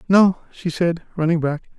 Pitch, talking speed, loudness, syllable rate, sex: 170 Hz, 170 wpm, -20 LUFS, 4.8 syllables/s, male